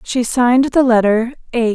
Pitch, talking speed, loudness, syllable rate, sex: 240 Hz, 170 wpm, -14 LUFS, 4.7 syllables/s, female